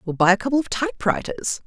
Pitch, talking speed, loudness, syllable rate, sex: 255 Hz, 215 wpm, -21 LUFS, 8.0 syllables/s, female